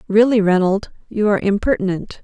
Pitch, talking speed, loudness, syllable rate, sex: 205 Hz, 135 wpm, -17 LUFS, 5.8 syllables/s, female